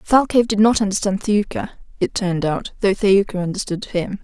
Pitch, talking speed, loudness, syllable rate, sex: 200 Hz, 170 wpm, -19 LUFS, 5.5 syllables/s, female